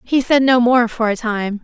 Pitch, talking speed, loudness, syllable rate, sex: 235 Hz, 255 wpm, -15 LUFS, 4.6 syllables/s, female